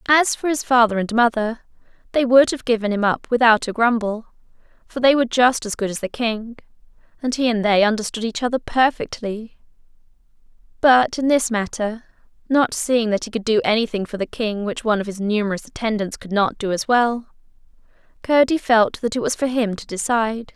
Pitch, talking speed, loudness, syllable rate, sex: 230 Hz, 195 wpm, -19 LUFS, 5.5 syllables/s, female